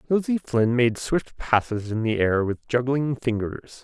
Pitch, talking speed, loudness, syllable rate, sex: 125 Hz, 170 wpm, -24 LUFS, 4.2 syllables/s, male